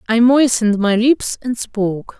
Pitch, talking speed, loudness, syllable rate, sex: 230 Hz, 165 wpm, -16 LUFS, 4.6 syllables/s, female